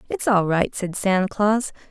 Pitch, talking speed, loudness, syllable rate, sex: 205 Hz, 190 wpm, -21 LUFS, 4.4 syllables/s, female